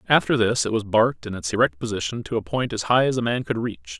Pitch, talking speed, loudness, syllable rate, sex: 110 Hz, 285 wpm, -22 LUFS, 6.2 syllables/s, male